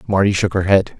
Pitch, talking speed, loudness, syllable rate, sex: 100 Hz, 240 wpm, -16 LUFS, 5.9 syllables/s, male